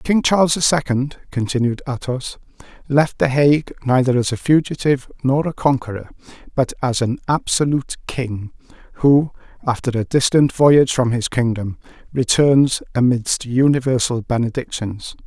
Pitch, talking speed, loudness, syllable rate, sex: 130 Hz, 130 wpm, -18 LUFS, 4.9 syllables/s, male